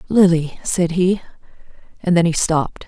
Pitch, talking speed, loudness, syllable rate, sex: 170 Hz, 145 wpm, -18 LUFS, 4.3 syllables/s, female